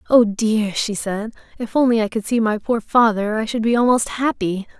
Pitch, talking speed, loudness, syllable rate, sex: 220 Hz, 215 wpm, -19 LUFS, 5.0 syllables/s, female